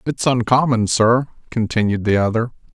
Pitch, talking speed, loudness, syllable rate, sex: 115 Hz, 130 wpm, -18 LUFS, 5.0 syllables/s, male